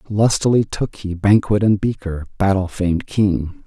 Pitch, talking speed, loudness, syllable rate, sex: 100 Hz, 150 wpm, -18 LUFS, 4.5 syllables/s, male